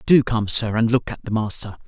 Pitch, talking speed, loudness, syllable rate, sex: 115 Hz, 255 wpm, -20 LUFS, 5.3 syllables/s, male